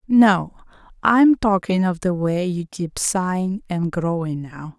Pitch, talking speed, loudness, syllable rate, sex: 185 Hz, 150 wpm, -20 LUFS, 3.7 syllables/s, female